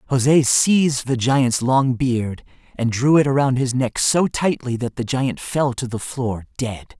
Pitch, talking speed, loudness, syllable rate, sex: 130 Hz, 190 wpm, -19 LUFS, 4.0 syllables/s, male